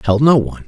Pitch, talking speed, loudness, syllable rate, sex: 125 Hz, 265 wpm, -14 LUFS, 6.4 syllables/s, male